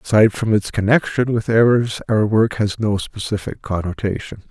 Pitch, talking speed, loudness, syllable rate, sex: 105 Hz, 160 wpm, -18 LUFS, 5.1 syllables/s, male